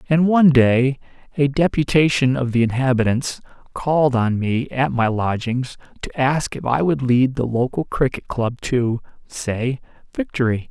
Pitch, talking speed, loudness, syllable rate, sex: 130 Hz, 150 wpm, -19 LUFS, 4.4 syllables/s, male